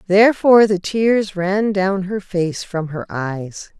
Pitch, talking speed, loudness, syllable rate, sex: 190 Hz, 160 wpm, -17 LUFS, 3.7 syllables/s, female